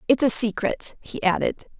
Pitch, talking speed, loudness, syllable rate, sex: 235 Hz, 165 wpm, -21 LUFS, 4.8 syllables/s, female